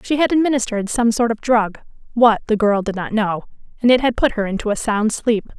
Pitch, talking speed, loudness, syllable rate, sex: 225 Hz, 215 wpm, -18 LUFS, 5.8 syllables/s, female